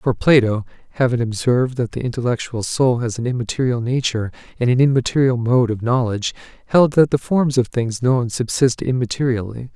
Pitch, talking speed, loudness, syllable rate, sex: 125 Hz, 165 wpm, -18 LUFS, 5.6 syllables/s, male